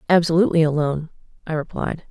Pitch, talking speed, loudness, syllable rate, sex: 165 Hz, 115 wpm, -20 LUFS, 7.0 syllables/s, female